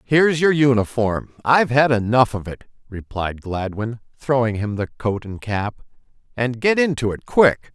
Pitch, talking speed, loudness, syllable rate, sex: 120 Hz, 165 wpm, -20 LUFS, 4.6 syllables/s, male